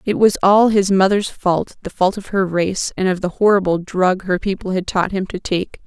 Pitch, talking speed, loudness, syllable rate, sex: 190 Hz, 215 wpm, -17 LUFS, 4.9 syllables/s, female